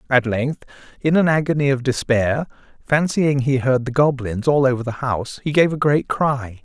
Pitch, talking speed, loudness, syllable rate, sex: 135 Hz, 190 wpm, -19 LUFS, 4.9 syllables/s, male